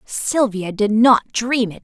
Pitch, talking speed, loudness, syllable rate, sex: 225 Hz, 165 wpm, -17 LUFS, 3.7 syllables/s, female